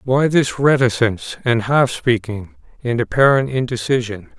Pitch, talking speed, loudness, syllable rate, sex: 125 Hz, 125 wpm, -17 LUFS, 4.6 syllables/s, male